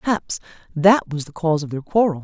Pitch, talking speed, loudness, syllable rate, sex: 170 Hz, 215 wpm, -20 LUFS, 6.1 syllables/s, female